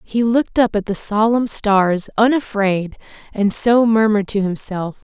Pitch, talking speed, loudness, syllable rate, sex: 210 Hz, 155 wpm, -17 LUFS, 4.5 syllables/s, female